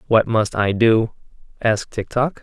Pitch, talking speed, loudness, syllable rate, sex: 115 Hz, 175 wpm, -19 LUFS, 4.5 syllables/s, male